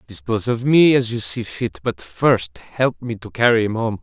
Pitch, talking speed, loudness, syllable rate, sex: 120 Hz, 225 wpm, -19 LUFS, 4.7 syllables/s, male